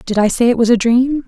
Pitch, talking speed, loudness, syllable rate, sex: 235 Hz, 330 wpm, -13 LUFS, 5.7 syllables/s, female